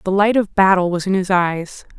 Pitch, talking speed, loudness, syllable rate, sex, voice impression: 190 Hz, 240 wpm, -16 LUFS, 5.1 syllables/s, female, feminine, adult-like, slightly muffled, sincere, slightly calm, slightly unique